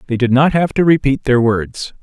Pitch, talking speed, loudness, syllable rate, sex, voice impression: 130 Hz, 235 wpm, -14 LUFS, 5.0 syllables/s, male, very masculine, slightly old, very thick, tensed, slightly weak, bright, soft, clear, fluent, slightly nasal, cool, intellectual, refreshing, very sincere, very calm, very mature, very friendly, reassuring, unique, elegant, wild, sweet, lively, kind, slightly intense